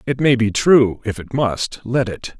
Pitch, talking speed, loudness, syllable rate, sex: 120 Hz, 225 wpm, -18 LUFS, 4.1 syllables/s, male